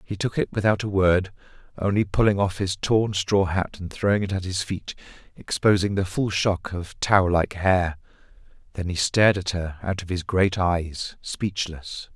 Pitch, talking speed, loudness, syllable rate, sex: 95 Hz, 190 wpm, -23 LUFS, 4.5 syllables/s, male